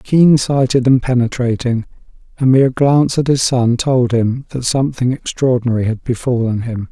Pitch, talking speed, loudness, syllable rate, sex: 125 Hz, 155 wpm, -15 LUFS, 5.1 syllables/s, male